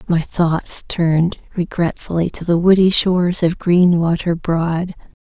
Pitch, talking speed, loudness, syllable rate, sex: 170 Hz, 125 wpm, -17 LUFS, 4.1 syllables/s, female